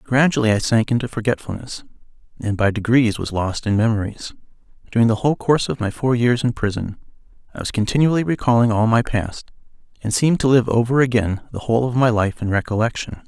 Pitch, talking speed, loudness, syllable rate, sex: 115 Hz, 190 wpm, -19 LUFS, 6.2 syllables/s, male